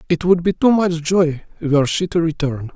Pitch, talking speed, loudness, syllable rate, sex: 165 Hz, 220 wpm, -18 LUFS, 5.1 syllables/s, male